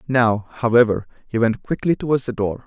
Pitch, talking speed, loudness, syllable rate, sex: 120 Hz, 180 wpm, -20 LUFS, 5.5 syllables/s, male